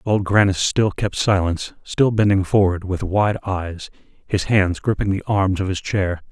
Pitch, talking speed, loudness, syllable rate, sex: 95 Hz, 180 wpm, -19 LUFS, 4.5 syllables/s, male